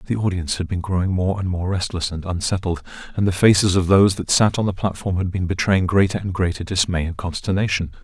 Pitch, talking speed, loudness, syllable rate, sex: 95 Hz, 225 wpm, -20 LUFS, 6.0 syllables/s, male